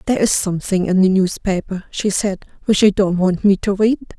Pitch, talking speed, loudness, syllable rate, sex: 195 Hz, 215 wpm, -17 LUFS, 5.6 syllables/s, female